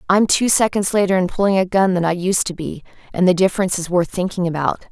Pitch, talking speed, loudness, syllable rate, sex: 185 Hz, 245 wpm, -17 LUFS, 6.4 syllables/s, female